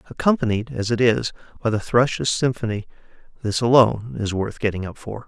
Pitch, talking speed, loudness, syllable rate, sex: 115 Hz, 170 wpm, -21 LUFS, 5.7 syllables/s, male